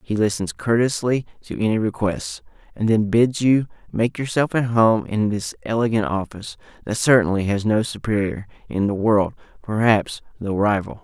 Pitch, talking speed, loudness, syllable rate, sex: 110 Hz, 160 wpm, -21 LUFS, 4.9 syllables/s, male